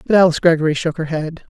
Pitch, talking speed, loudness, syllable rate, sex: 160 Hz, 230 wpm, -17 LUFS, 7.5 syllables/s, female